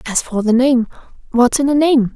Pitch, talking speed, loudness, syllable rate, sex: 250 Hz, 195 wpm, -15 LUFS, 5.1 syllables/s, female